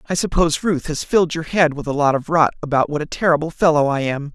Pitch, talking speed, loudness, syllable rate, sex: 155 Hz, 260 wpm, -18 LUFS, 6.3 syllables/s, male